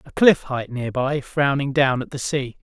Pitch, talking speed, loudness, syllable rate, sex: 135 Hz, 200 wpm, -21 LUFS, 4.5 syllables/s, male